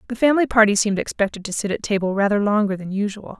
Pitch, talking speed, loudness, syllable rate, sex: 210 Hz, 230 wpm, -20 LUFS, 7.2 syllables/s, female